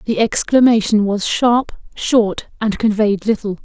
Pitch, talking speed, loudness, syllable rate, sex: 215 Hz, 130 wpm, -16 LUFS, 4.1 syllables/s, female